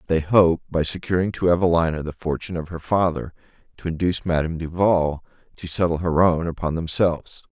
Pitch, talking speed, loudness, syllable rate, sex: 85 Hz, 165 wpm, -22 LUFS, 5.9 syllables/s, male